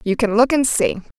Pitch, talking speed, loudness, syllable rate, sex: 230 Hz, 255 wpm, -17 LUFS, 5.2 syllables/s, female